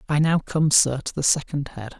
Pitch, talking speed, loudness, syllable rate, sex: 145 Hz, 240 wpm, -21 LUFS, 5.1 syllables/s, male